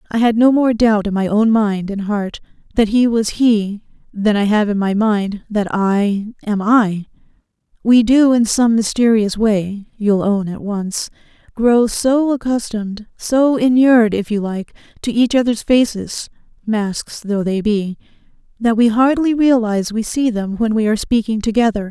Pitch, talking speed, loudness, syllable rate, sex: 220 Hz, 170 wpm, -16 LUFS, 4.3 syllables/s, female